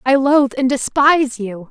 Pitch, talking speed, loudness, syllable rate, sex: 265 Hz, 175 wpm, -15 LUFS, 5.1 syllables/s, female